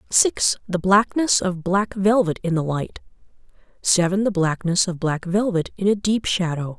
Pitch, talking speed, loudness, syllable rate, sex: 185 Hz, 170 wpm, -20 LUFS, 5.1 syllables/s, female